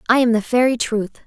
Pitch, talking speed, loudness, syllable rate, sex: 235 Hz, 235 wpm, -18 LUFS, 6.4 syllables/s, female